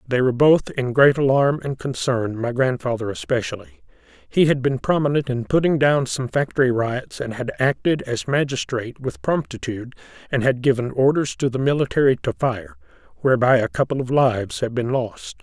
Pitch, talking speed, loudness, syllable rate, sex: 130 Hz, 170 wpm, -20 LUFS, 5.3 syllables/s, male